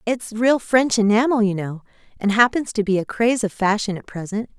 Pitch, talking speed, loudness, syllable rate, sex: 220 Hz, 210 wpm, -20 LUFS, 5.4 syllables/s, female